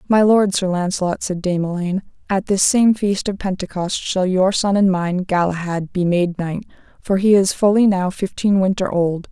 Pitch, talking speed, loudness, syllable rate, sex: 190 Hz, 195 wpm, -18 LUFS, 4.8 syllables/s, female